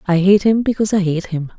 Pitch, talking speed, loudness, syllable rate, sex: 190 Hz, 265 wpm, -16 LUFS, 6.3 syllables/s, female